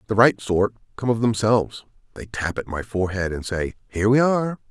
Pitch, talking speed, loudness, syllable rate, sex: 105 Hz, 205 wpm, -22 LUFS, 5.8 syllables/s, male